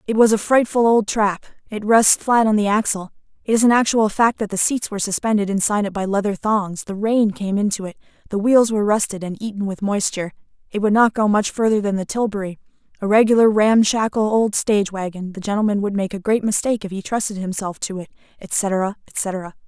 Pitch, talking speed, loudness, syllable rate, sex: 205 Hz, 215 wpm, -19 LUFS, 5.8 syllables/s, female